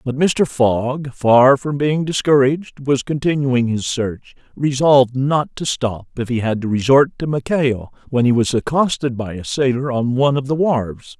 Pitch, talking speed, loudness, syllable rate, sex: 130 Hz, 180 wpm, -17 LUFS, 4.5 syllables/s, male